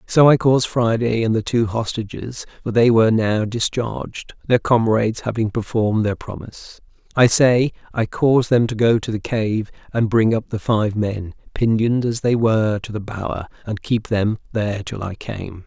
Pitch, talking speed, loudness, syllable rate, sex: 110 Hz, 180 wpm, -19 LUFS, 4.9 syllables/s, male